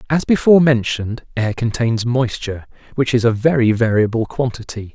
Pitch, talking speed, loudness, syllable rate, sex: 120 Hz, 145 wpm, -17 LUFS, 5.5 syllables/s, male